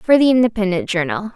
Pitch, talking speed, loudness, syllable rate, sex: 205 Hz, 175 wpm, -17 LUFS, 6.1 syllables/s, female